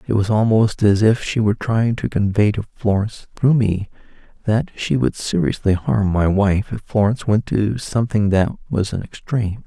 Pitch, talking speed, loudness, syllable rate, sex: 110 Hz, 185 wpm, -19 LUFS, 5.0 syllables/s, male